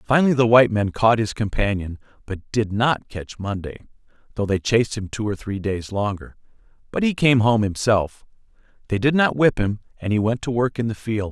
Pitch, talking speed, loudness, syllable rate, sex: 110 Hz, 205 wpm, -21 LUFS, 5.3 syllables/s, male